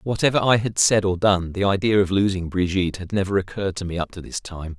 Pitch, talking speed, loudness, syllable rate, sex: 95 Hz, 250 wpm, -21 LUFS, 6.1 syllables/s, male